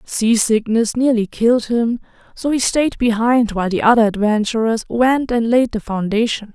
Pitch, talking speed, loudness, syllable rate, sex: 230 Hz, 165 wpm, -16 LUFS, 4.8 syllables/s, female